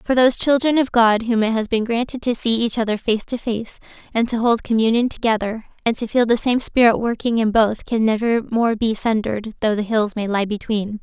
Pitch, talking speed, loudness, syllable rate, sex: 225 Hz, 230 wpm, -19 LUFS, 5.5 syllables/s, female